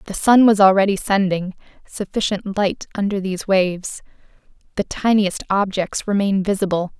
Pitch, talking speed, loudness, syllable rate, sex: 195 Hz, 130 wpm, -18 LUFS, 5.2 syllables/s, female